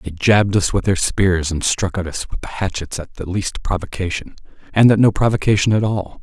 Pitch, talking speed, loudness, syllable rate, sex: 95 Hz, 220 wpm, -18 LUFS, 5.5 syllables/s, male